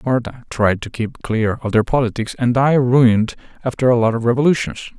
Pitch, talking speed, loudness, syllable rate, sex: 120 Hz, 195 wpm, -17 LUFS, 5.5 syllables/s, male